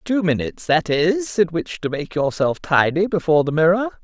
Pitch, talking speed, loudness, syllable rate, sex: 170 Hz, 195 wpm, -19 LUFS, 5.3 syllables/s, male